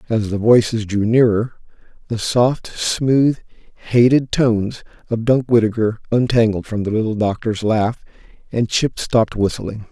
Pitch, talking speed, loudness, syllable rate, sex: 115 Hz, 140 wpm, -17 LUFS, 4.3 syllables/s, male